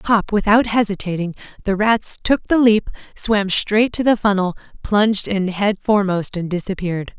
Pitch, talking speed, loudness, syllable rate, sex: 205 Hz, 160 wpm, -18 LUFS, 4.9 syllables/s, female